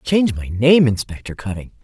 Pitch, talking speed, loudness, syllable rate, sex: 120 Hz, 165 wpm, -18 LUFS, 5.6 syllables/s, female